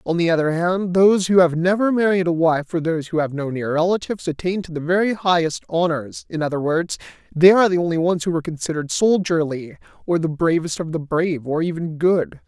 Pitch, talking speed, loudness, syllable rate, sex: 170 Hz, 215 wpm, -19 LUFS, 6.0 syllables/s, male